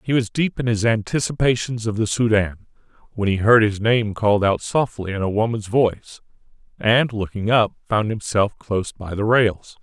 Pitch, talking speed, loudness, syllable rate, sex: 110 Hz, 185 wpm, -20 LUFS, 5.0 syllables/s, male